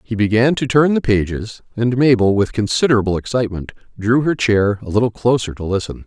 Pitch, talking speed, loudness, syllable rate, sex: 115 Hz, 190 wpm, -17 LUFS, 5.8 syllables/s, male